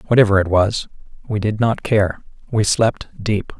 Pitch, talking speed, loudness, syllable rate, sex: 105 Hz, 165 wpm, -18 LUFS, 4.7 syllables/s, male